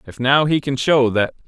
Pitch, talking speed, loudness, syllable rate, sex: 135 Hz, 245 wpm, -17 LUFS, 4.9 syllables/s, male